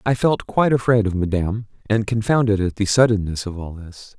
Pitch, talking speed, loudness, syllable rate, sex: 105 Hz, 200 wpm, -19 LUFS, 5.7 syllables/s, male